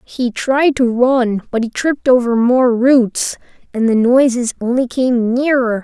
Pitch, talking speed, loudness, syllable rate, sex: 245 Hz, 165 wpm, -14 LUFS, 4.0 syllables/s, female